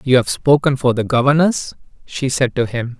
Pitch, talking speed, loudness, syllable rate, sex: 130 Hz, 200 wpm, -16 LUFS, 5.0 syllables/s, male